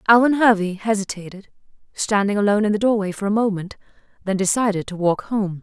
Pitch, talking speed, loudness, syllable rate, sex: 205 Hz, 170 wpm, -20 LUFS, 6.1 syllables/s, female